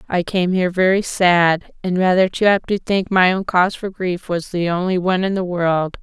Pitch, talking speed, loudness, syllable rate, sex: 180 Hz, 230 wpm, -18 LUFS, 5.1 syllables/s, female